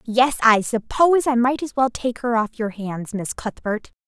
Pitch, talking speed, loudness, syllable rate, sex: 235 Hz, 205 wpm, -20 LUFS, 4.5 syllables/s, female